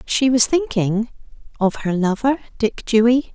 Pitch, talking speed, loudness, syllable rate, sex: 230 Hz, 125 wpm, -18 LUFS, 4.3 syllables/s, female